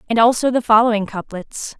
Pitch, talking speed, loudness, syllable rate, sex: 225 Hz, 165 wpm, -16 LUFS, 5.7 syllables/s, female